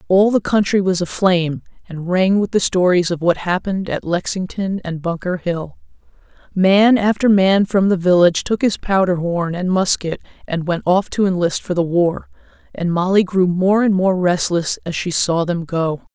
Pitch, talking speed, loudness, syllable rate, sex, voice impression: 180 Hz, 185 wpm, -17 LUFS, 4.8 syllables/s, female, very feminine, very adult-like, slightly clear, slightly calm, elegant